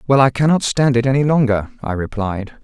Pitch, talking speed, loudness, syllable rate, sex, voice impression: 125 Hz, 205 wpm, -17 LUFS, 5.7 syllables/s, male, masculine, adult-like, slightly powerful, hard, clear, slightly halting, cute, intellectual, calm, slightly mature, wild, slightly strict